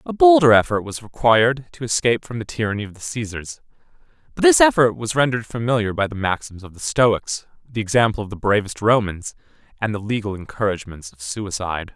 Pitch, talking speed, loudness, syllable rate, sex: 110 Hz, 185 wpm, -19 LUFS, 6.0 syllables/s, male